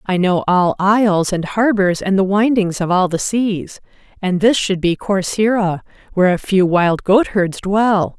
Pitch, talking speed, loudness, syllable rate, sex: 195 Hz, 175 wpm, -16 LUFS, 4.2 syllables/s, female